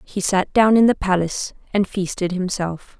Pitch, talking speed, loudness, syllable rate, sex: 190 Hz, 180 wpm, -19 LUFS, 4.8 syllables/s, female